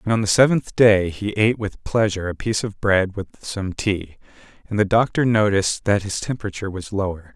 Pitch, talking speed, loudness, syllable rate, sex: 105 Hz, 205 wpm, -20 LUFS, 5.6 syllables/s, male